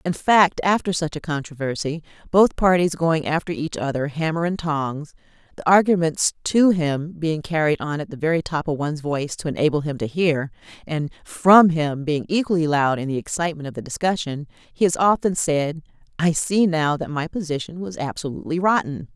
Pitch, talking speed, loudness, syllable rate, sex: 160 Hz, 185 wpm, -21 LUFS, 5.3 syllables/s, female